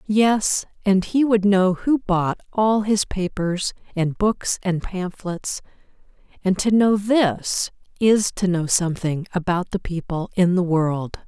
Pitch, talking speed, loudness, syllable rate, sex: 190 Hz, 150 wpm, -21 LUFS, 3.6 syllables/s, female